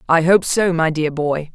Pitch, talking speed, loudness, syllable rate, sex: 165 Hz, 235 wpm, -17 LUFS, 4.4 syllables/s, female